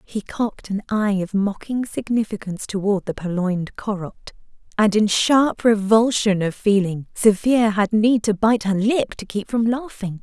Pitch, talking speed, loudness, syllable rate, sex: 210 Hz, 165 wpm, -20 LUFS, 4.5 syllables/s, female